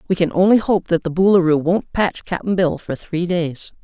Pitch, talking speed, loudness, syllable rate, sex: 175 Hz, 220 wpm, -18 LUFS, 4.8 syllables/s, female